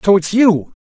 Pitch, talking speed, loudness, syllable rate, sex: 195 Hz, 215 wpm, -13 LUFS, 4.6 syllables/s, male